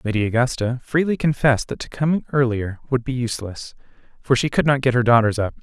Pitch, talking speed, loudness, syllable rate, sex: 125 Hz, 205 wpm, -20 LUFS, 6.0 syllables/s, male